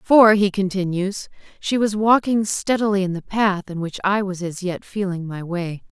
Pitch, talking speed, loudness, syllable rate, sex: 195 Hz, 190 wpm, -20 LUFS, 4.6 syllables/s, female